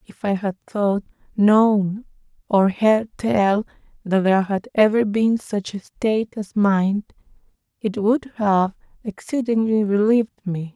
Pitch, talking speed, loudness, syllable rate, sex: 210 Hz, 135 wpm, -20 LUFS, 3.9 syllables/s, female